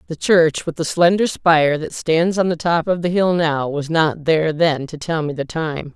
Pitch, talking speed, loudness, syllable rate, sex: 160 Hz, 240 wpm, -18 LUFS, 4.7 syllables/s, female